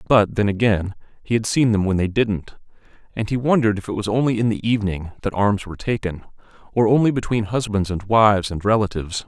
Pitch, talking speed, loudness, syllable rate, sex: 105 Hz, 205 wpm, -20 LUFS, 6.1 syllables/s, male